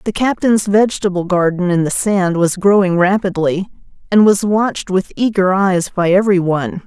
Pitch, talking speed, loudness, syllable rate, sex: 190 Hz, 155 wpm, -14 LUFS, 4.9 syllables/s, female